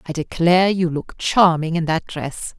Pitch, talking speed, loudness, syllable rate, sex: 170 Hz, 185 wpm, -19 LUFS, 4.5 syllables/s, female